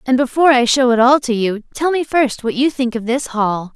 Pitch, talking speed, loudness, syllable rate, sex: 250 Hz, 270 wpm, -15 LUFS, 5.4 syllables/s, female